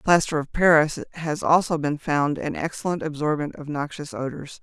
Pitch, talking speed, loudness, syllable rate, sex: 155 Hz, 170 wpm, -23 LUFS, 5.0 syllables/s, female